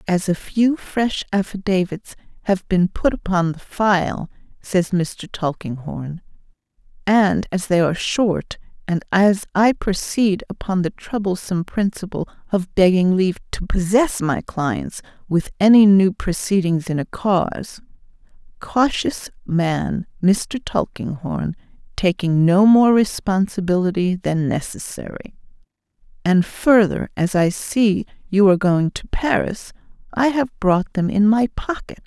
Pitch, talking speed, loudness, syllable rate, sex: 190 Hz, 125 wpm, -19 LUFS, 4.1 syllables/s, female